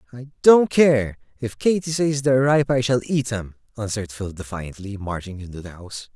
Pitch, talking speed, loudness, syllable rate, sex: 120 Hz, 185 wpm, -20 LUFS, 5.3 syllables/s, male